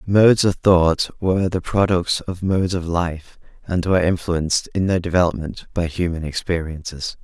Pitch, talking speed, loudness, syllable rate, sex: 90 Hz, 160 wpm, -20 LUFS, 5.0 syllables/s, male